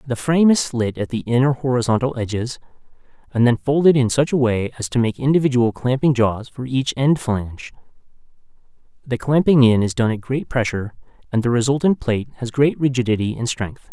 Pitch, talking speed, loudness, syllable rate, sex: 125 Hz, 185 wpm, -19 LUFS, 5.8 syllables/s, male